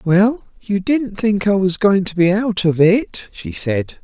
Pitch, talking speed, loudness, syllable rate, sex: 180 Hz, 210 wpm, -17 LUFS, 3.7 syllables/s, male